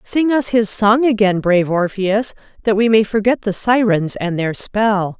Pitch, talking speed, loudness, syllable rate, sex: 210 Hz, 185 wpm, -16 LUFS, 4.4 syllables/s, female